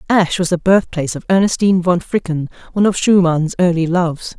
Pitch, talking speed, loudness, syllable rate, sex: 180 Hz, 180 wpm, -15 LUFS, 5.9 syllables/s, female